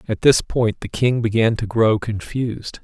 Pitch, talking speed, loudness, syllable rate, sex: 110 Hz, 190 wpm, -19 LUFS, 4.5 syllables/s, male